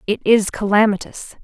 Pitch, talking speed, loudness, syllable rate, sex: 210 Hz, 125 wpm, -17 LUFS, 5.0 syllables/s, female